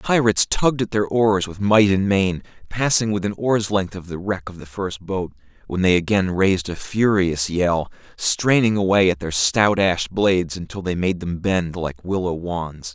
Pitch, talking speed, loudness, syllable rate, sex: 95 Hz, 200 wpm, -20 LUFS, 4.7 syllables/s, male